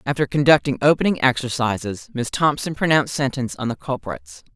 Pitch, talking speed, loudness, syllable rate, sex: 135 Hz, 145 wpm, -20 LUFS, 5.8 syllables/s, female